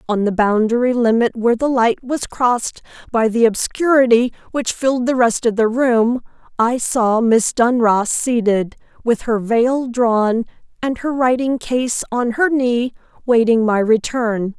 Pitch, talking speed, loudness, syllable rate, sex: 240 Hz, 155 wpm, -17 LUFS, 4.2 syllables/s, female